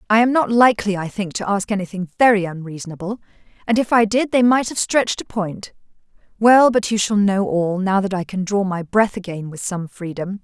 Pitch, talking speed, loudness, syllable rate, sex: 200 Hz, 220 wpm, -18 LUFS, 5.5 syllables/s, female